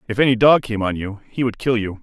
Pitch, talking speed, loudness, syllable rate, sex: 115 Hz, 295 wpm, -19 LUFS, 6.2 syllables/s, male